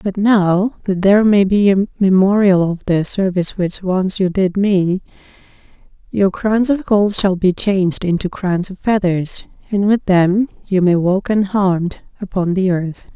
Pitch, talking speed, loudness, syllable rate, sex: 190 Hz, 170 wpm, -16 LUFS, 4.3 syllables/s, female